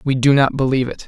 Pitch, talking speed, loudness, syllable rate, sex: 130 Hz, 280 wpm, -16 LUFS, 7.2 syllables/s, male